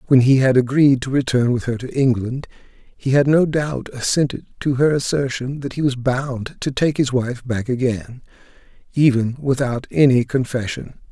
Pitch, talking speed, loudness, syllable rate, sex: 130 Hz, 175 wpm, -19 LUFS, 4.7 syllables/s, male